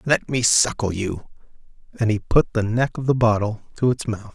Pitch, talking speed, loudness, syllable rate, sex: 115 Hz, 205 wpm, -21 LUFS, 5.2 syllables/s, male